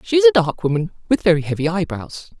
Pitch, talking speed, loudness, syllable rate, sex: 185 Hz, 225 wpm, -18 LUFS, 6.4 syllables/s, male